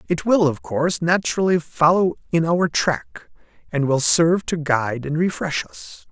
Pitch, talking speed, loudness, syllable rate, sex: 150 Hz, 165 wpm, -20 LUFS, 4.7 syllables/s, male